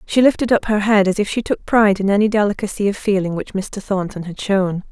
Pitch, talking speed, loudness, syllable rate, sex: 200 Hz, 245 wpm, -18 LUFS, 5.9 syllables/s, female